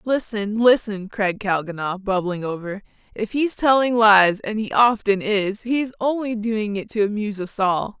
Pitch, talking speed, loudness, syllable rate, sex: 210 Hz, 150 wpm, -20 LUFS, 4.4 syllables/s, female